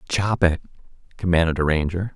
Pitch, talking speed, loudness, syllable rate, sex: 85 Hz, 140 wpm, -21 LUFS, 5.8 syllables/s, male